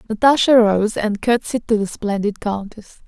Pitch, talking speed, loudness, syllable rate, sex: 215 Hz, 155 wpm, -18 LUFS, 4.6 syllables/s, female